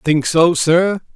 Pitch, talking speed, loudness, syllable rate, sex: 165 Hz, 155 wpm, -14 LUFS, 3.1 syllables/s, male